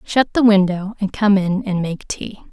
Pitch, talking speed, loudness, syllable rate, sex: 200 Hz, 215 wpm, -18 LUFS, 4.3 syllables/s, female